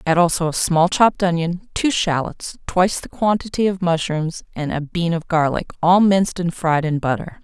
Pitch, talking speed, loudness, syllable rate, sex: 175 Hz, 195 wpm, -19 LUFS, 5.0 syllables/s, female